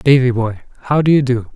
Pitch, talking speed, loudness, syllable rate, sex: 125 Hz, 230 wpm, -15 LUFS, 6.1 syllables/s, male